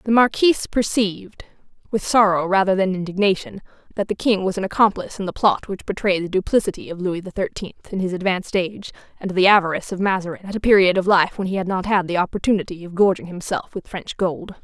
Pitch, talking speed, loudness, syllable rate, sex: 190 Hz, 215 wpm, -20 LUFS, 6.3 syllables/s, female